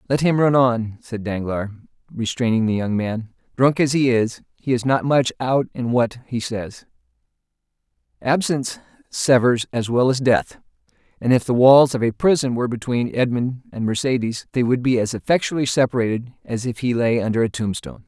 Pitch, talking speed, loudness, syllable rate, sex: 125 Hz, 180 wpm, -20 LUFS, 5.2 syllables/s, male